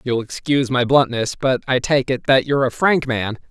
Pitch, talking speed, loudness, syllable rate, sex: 130 Hz, 225 wpm, -18 LUFS, 5.2 syllables/s, male